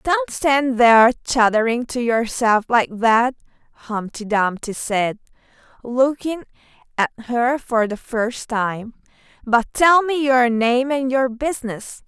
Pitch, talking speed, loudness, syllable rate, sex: 245 Hz, 130 wpm, -19 LUFS, 3.7 syllables/s, female